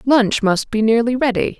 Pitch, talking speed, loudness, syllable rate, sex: 230 Hz, 190 wpm, -16 LUFS, 4.7 syllables/s, female